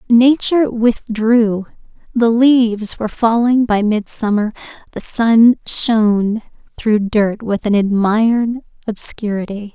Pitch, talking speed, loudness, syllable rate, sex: 225 Hz, 105 wpm, -15 LUFS, 3.9 syllables/s, female